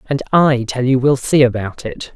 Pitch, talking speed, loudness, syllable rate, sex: 130 Hz, 220 wpm, -15 LUFS, 4.7 syllables/s, male